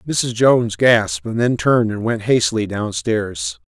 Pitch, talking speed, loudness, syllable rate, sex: 115 Hz, 165 wpm, -17 LUFS, 4.6 syllables/s, male